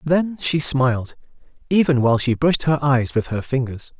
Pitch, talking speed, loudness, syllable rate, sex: 135 Hz, 180 wpm, -19 LUFS, 5.2 syllables/s, male